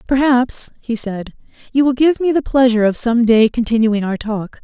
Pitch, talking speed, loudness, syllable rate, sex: 240 Hz, 195 wpm, -15 LUFS, 5.0 syllables/s, female